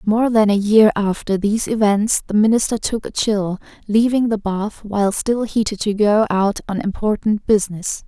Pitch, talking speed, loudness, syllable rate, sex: 210 Hz, 180 wpm, -18 LUFS, 4.8 syllables/s, female